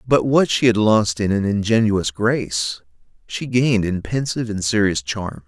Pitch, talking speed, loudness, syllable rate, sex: 105 Hz, 165 wpm, -19 LUFS, 4.5 syllables/s, male